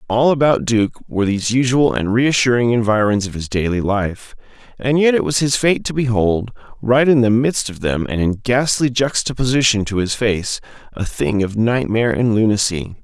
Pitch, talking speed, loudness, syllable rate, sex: 115 Hz, 185 wpm, -17 LUFS, 5.0 syllables/s, male